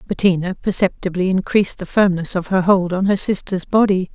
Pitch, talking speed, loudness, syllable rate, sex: 185 Hz, 175 wpm, -18 LUFS, 5.6 syllables/s, female